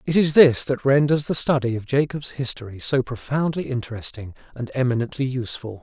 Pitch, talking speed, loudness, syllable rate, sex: 130 Hz, 165 wpm, -22 LUFS, 5.7 syllables/s, male